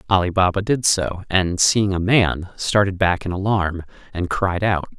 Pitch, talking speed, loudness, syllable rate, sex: 95 Hz, 180 wpm, -19 LUFS, 4.4 syllables/s, male